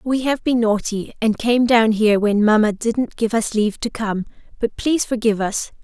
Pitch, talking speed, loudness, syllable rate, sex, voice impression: 225 Hz, 205 wpm, -19 LUFS, 5.1 syllables/s, female, feminine, slightly adult-like, slightly powerful, slightly clear, intellectual, slightly sharp